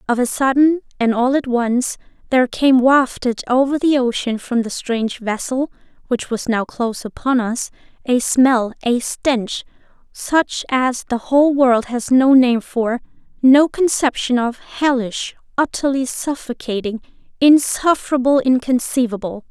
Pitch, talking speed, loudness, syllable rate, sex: 255 Hz, 125 wpm, -17 LUFS, 4.0 syllables/s, female